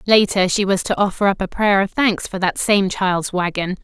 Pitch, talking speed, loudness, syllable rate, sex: 190 Hz, 235 wpm, -18 LUFS, 4.9 syllables/s, female